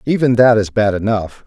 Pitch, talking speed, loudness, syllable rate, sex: 110 Hz, 205 wpm, -14 LUFS, 5.2 syllables/s, male